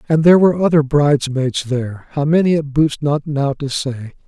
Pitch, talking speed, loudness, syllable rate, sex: 145 Hz, 195 wpm, -16 LUFS, 5.5 syllables/s, male